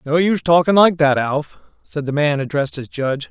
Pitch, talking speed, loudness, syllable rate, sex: 150 Hz, 220 wpm, -17 LUFS, 6.1 syllables/s, male